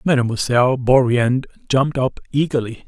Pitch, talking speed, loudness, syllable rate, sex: 130 Hz, 105 wpm, -18 LUFS, 5.9 syllables/s, male